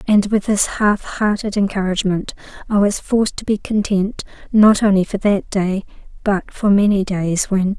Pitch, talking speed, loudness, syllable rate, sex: 200 Hz, 170 wpm, -17 LUFS, 4.7 syllables/s, female